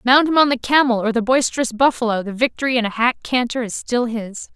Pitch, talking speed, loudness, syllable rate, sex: 240 Hz, 235 wpm, -18 LUFS, 6.0 syllables/s, female